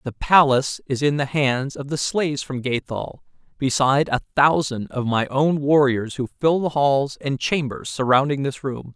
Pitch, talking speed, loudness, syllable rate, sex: 140 Hz, 180 wpm, -21 LUFS, 4.7 syllables/s, male